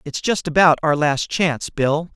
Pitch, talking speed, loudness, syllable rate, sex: 155 Hz, 195 wpm, -18 LUFS, 4.6 syllables/s, male